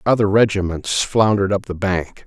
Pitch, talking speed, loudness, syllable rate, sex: 100 Hz, 160 wpm, -18 LUFS, 5.1 syllables/s, male